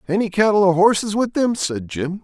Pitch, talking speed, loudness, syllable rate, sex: 190 Hz, 215 wpm, -18 LUFS, 5.4 syllables/s, male